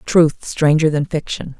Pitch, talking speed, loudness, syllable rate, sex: 155 Hz, 150 wpm, -17 LUFS, 4.0 syllables/s, female